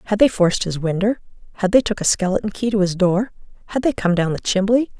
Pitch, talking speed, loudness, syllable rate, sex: 200 Hz, 215 wpm, -19 LUFS, 6.4 syllables/s, female